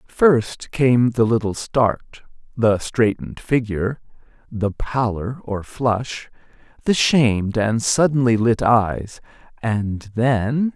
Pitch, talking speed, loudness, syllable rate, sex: 115 Hz, 110 wpm, -19 LUFS, 3.4 syllables/s, male